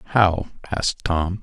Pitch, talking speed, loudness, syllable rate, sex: 90 Hz, 125 wpm, -22 LUFS, 3.4 syllables/s, male